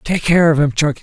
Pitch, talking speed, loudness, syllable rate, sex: 155 Hz, 290 wpm, -14 LUFS, 6.1 syllables/s, male